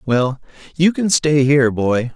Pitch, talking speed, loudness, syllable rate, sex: 140 Hz, 165 wpm, -16 LUFS, 4.1 syllables/s, male